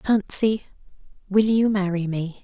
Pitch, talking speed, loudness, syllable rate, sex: 200 Hz, 125 wpm, -21 LUFS, 4.0 syllables/s, female